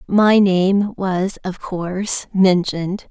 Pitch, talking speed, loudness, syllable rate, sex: 190 Hz, 115 wpm, -18 LUFS, 3.2 syllables/s, female